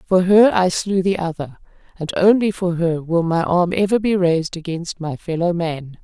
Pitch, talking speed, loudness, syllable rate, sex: 175 Hz, 200 wpm, -18 LUFS, 4.7 syllables/s, female